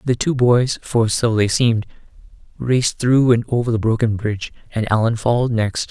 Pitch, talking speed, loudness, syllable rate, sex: 115 Hz, 165 wpm, -18 LUFS, 5.4 syllables/s, male